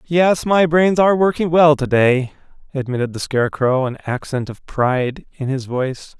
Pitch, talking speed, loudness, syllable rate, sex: 145 Hz, 165 wpm, -17 LUFS, 4.8 syllables/s, male